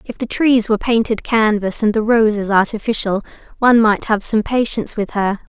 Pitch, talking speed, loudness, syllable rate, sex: 220 Hz, 185 wpm, -16 LUFS, 5.4 syllables/s, female